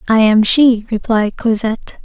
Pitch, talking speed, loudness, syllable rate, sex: 225 Hz, 145 wpm, -13 LUFS, 4.5 syllables/s, female